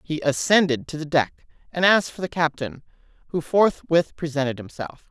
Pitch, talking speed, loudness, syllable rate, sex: 155 Hz, 165 wpm, -22 LUFS, 5.2 syllables/s, female